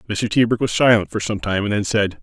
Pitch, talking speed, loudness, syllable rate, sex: 105 Hz, 270 wpm, -18 LUFS, 5.8 syllables/s, male